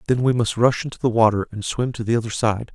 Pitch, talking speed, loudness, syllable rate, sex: 115 Hz, 285 wpm, -21 LUFS, 6.4 syllables/s, male